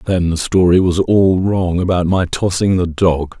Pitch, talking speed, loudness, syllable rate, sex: 90 Hz, 195 wpm, -15 LUFS, 4.2 syllables/s, male